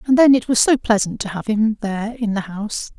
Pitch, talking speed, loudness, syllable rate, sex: 220 Hz, 260 wpm, -18 LUFS, 5.8 syllables/s, female